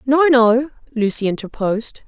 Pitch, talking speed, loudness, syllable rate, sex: 245 Hz, 115 wpm, -17 LUFS, 4.6 syllables/s, female